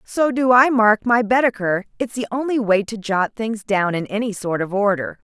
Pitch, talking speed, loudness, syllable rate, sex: 220 Hz, 215 wpm, -19 LUFS, 4.9 syllables/s, female